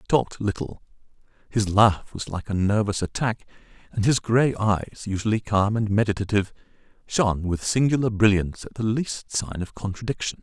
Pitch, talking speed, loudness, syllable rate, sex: 105 Hz, 160 wpm, -24 LUFS, 5.4 syllables/s, male